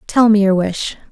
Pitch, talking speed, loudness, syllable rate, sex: 205 Hz, 215 wpm, -14 LUFS, 4.7 syllables/s, female